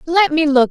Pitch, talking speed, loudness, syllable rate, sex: 310 Hz, 255 wpm, -14 LUFS, 4.8 syllables/s, female